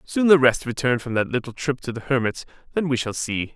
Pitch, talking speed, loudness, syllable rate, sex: 130 Hz, 255 wpm, -22 LUFS, 5.7 syllables/s, male